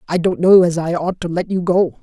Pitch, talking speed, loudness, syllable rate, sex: 175 Hz, 295 wpm, -16 LUFS, 5.4 syllables/s, female